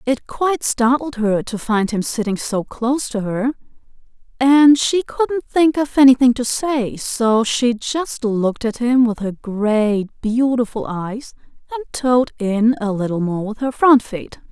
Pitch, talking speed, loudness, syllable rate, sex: 240 Hz, 170 wpm, -18 LUFS, 4.1 syllables/s, female